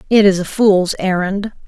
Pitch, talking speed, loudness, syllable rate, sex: 195 Hz, 180 wpm, -15 LUFS, 4.6 syllables/s, female